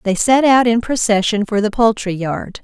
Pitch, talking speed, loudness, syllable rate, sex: 220 Hz, 205 wpm, -15 LUFS, 4.8 syllables/s, female